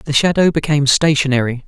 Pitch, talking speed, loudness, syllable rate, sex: 145 Hz, 145 wpm, -14 LUFS, 6.1 syllables/s, male